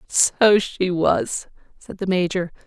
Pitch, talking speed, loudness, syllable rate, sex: 185 Hz, 135 wpm, -20 LUFS, 3.8 syllables/s, female